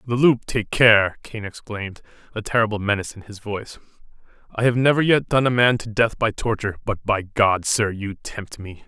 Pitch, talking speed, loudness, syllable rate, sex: 110 Hz, 205 wpm, -20 LUFS, 5.3 syllables/s, male